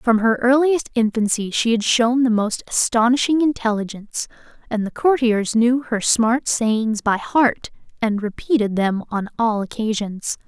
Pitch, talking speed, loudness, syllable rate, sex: 230 Hz, 150 wpm, -19 LUFS, 4.4 syllables/s, female